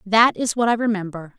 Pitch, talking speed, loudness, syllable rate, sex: 215 Hz, 215 wpm, -19 LUFS, 5.5 syllables/s, female